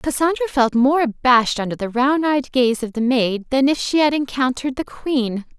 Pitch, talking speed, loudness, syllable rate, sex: 260 Hz, 205 wpm, -18 LUFS, 5.1 syllables/s, female